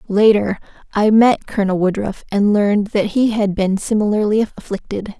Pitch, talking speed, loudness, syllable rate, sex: 205 Hz, 150 wpm, -17 LUFS, 5.0 syllables/s, female